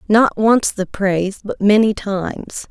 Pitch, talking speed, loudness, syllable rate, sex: 205 Hz, 155 wpm, -17 LUFS, 4.1 syllables/s, female